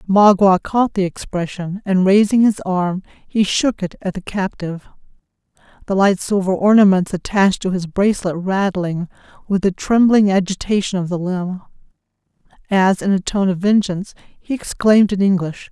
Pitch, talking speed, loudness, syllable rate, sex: 190 Hz, 155 wpm, -17 LUFS, 4.9 syllables/s, female